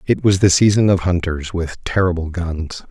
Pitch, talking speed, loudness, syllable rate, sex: 90 Hz, 185 wpm, -17 LUFS, 4.7 syllables/s, male